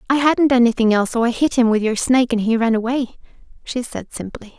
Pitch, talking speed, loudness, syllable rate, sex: 240 Hz, 235 wpm, -17 LUFS, 6.3 syllables/s, female